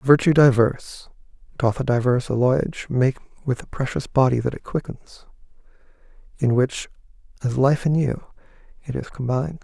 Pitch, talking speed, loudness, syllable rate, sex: 130 Hz, 145 wpm, -21 LUFS, 5.0 syllables/s, male